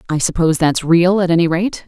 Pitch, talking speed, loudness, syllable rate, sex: 170 Hz, 225 wpm, -15 LUFS, 6.0 syllables/s, female